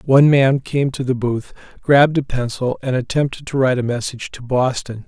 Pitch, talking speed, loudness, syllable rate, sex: 130 Hz, 200 wpm, -18 LUFS, 5.6 syllables/s, male